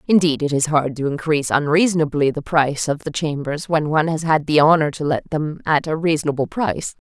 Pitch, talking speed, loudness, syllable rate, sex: 150 Hz, 210 wpm, -19 LUFS, 5.9 syllables/s, female